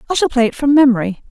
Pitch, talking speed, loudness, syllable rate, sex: 255 Hz, 275 wpm, -14 LUFS, 7.8 syllables/s, female